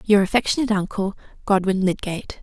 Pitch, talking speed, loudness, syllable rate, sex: 200 Hz, 125 wpm, -21 LUFS, 6.4 syllables/s, female